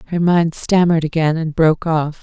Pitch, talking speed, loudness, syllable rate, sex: 160 Hz, 190 wpm, -16 LUFS, 5.5 syllables/s, female